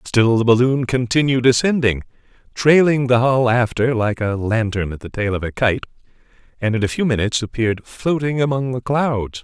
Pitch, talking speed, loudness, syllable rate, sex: 120 Hz, 180 wpm, -18 LUFS, 5.2 syllables/s, male